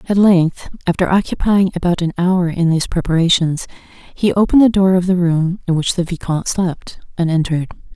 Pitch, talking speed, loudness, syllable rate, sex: 175 Hz, 180 wpm, -16 LUFS, 5.5 syllables/s, female